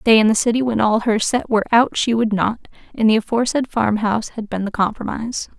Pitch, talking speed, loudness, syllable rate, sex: 220 Hz, 225 wpm, -18 LUFS, 6.0 syllables/s, female